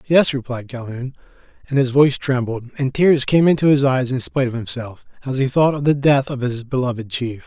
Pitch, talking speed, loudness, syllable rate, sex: 130 Hz, 215 wpm, -18 LUFS, 5.6 syllables/s, male